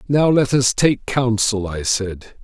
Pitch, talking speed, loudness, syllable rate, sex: 120 Hz, 170 wpm, -18 LUFS, 3.8 syllables/s, male